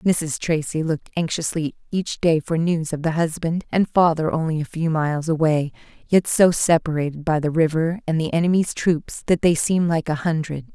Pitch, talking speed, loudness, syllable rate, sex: 160 Hz, 190 wpm, -21 LUFS, 5.1 syllables/s, female